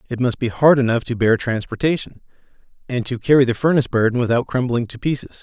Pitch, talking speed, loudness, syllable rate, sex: 125 Hz, 200 wpm, -19 LUFS, 6.4 syllables/s, male